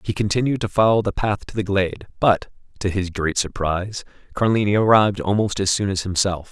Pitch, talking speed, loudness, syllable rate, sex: 100 Hz, 195 wpm, -20 LUFS, 5.8 syllables/s, male